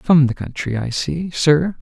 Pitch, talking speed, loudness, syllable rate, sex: 140 Hz, 195 wpm, -18 LUFS, 4.0 syllables/s, male